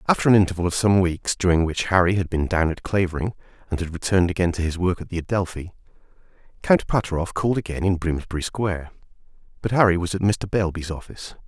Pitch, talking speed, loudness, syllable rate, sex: 90 Hz, 200 wpm, -22 LUFS, 6.6 syllables/s, male